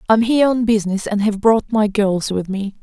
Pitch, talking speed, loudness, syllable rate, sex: 215 Hz, 235 wpm, -17 LUFS, 5.4 syllables/s, female